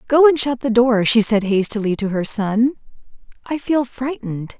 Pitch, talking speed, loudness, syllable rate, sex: 235 Hz, 185 wpm, -18 LUFS, 4.8 syllables/s, female